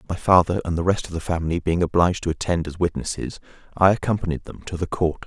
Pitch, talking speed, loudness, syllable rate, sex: 85 Hz, 230 wpm, -22 LUFS, 6.7 syllables/s, male